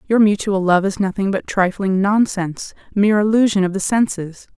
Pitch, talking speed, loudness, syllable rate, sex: 200 Hz, 170 wpm, -17 LUFS, 5.2 syllables/s, female